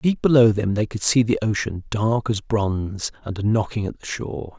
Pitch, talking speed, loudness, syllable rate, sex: 110 Hz, 210 wpm, -21 LUFS, 4.9 syllables/s, male